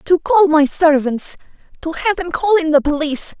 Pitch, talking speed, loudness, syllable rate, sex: 325 Hz, 175 wpm, -15 LUFS, 5.2 syllables/s, female